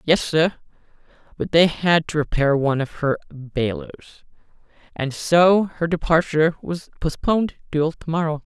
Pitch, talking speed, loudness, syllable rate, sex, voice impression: 155 Hz, 140 wpm, -20 LUFS, 4.7 syllables/s, male, masculine, adult-like, tensed, powerful, clear, halting, calm, friendly, lively, kind, slightly modest